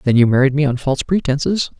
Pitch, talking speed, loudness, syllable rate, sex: 140 Hz, 235 wpm, -16 LUFS, 6.8 syllables/s, male